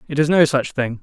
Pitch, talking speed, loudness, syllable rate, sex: 140 Hz, 290 wpm, -17 LUFS, 5.8 syllables/s, male